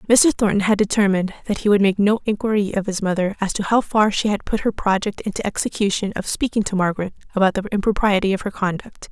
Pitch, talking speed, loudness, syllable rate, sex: 200 Hz, 225 wpm, -20 LUFS, 6.4 syllables/s, female